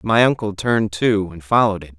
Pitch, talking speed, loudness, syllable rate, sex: 105 Hz, 210 wpm, -18 LUFS, 6.0 syllables/s, male